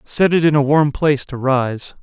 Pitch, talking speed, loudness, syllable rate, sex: 140 Hz, 235 wpm, -16 LUFS, 4.8 syllables/s, male